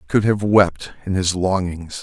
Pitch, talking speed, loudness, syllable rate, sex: 95 Hz, 205 wpm, -19 LUFS, 4.9 syllables/s, male